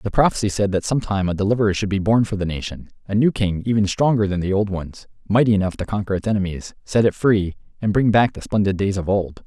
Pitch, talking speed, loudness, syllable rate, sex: 100 Hz, 255 wpm, -20 LUFS, 6.2 syllables/s, male